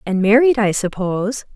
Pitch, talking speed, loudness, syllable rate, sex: 215 Hz, 155 wpm, -17 LUFS, 5.2 syllables/s, female